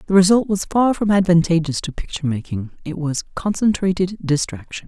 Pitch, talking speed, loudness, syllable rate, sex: 175 Hz, 160 wpm, -19 LUFS, 5.6 syllables/s, female